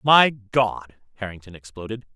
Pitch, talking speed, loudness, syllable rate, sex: 110 Hz, 110 wpm, -22 LUFS, 4.4 syllables/s, male